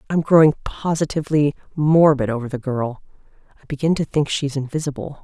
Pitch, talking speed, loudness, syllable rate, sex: 145 Hz, 150 wpm, -19 LUFS, 5.7 syllables/s, female